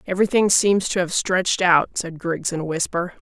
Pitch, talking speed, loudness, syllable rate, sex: 180 Hz, 200 wpm, -20 LUFS, 5.2 syllables/s, female